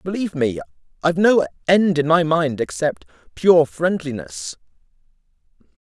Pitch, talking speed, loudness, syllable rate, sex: 145 Hz, 115 wpm, -19 LUFS, 4.7 syllables/s, male